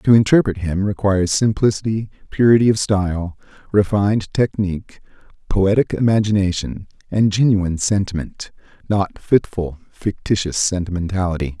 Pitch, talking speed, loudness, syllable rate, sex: 100 Hz, 95 wpm, -18 LUFS, 5.1 syllables/s, male